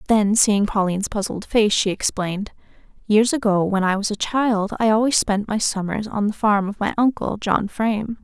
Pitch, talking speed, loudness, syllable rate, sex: 210 Hz, 195 wpm, -20 LUFS, 5.0 syllables/s, female